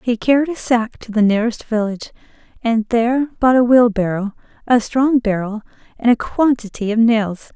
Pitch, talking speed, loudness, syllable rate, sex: 230 Hz, 165 wpm, -17 LUFS, 5.3 syllables/s, female